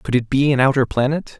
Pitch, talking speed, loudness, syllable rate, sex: 135 Hz, 260 wpm, -17 LUFS, 5.9 syllables/s, male